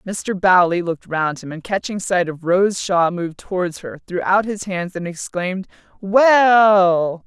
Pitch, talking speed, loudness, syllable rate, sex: 185 Hz, 175 wpm, -18 LUFS, 4.2 syllables/s, female